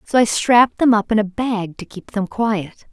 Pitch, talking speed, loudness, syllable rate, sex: 215 Hz, 245 wpm, -18 LUFS, 4.7 syllables/s, female